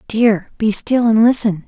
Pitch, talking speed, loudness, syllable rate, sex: 220 Hz, 180 wpm, -15 LUFS, 4.2 syllables/s, female